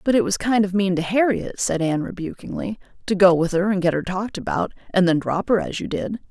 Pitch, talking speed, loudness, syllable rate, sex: 190 Hz, 255 wpm, -21 LUFS, 6.0 syllables/s, female